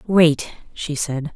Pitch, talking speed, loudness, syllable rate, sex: 155 Hz, 135 wpm, -20 LUFS, 2.9 syllables/s, female